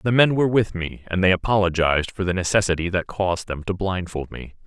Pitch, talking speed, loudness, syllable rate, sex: 95 Hz, 220 wpm, -21 LUFS, 6.1 syllables/s, male